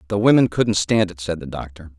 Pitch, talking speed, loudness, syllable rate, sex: 95 Hz, 240 wpm, -19 LUFS, 5.8 syllables/s, male